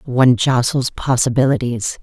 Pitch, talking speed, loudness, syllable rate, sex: 125 Hz, 90 wpm, -16 LUFS, 4.7 syllables/s, female